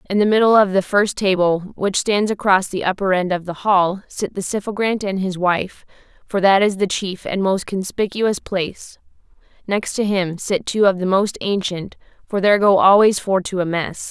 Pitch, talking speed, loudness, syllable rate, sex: 195 Hz, 205 wpm, -18 LUFS, 4.8 syllables/s, female